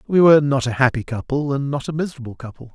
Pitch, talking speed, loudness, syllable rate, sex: 135 Hz, 240 wpm, -19 LUFS, 6.9 syllables/s, male